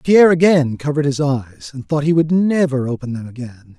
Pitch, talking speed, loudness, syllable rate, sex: 140 Hz, 205 wpm, -16 LUFS, 5.5 syllables/s, male